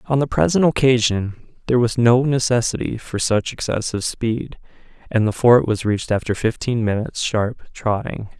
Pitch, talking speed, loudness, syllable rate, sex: 115 Hz, 155 wpm, -19 LUFS, 5.1 syllables/s, male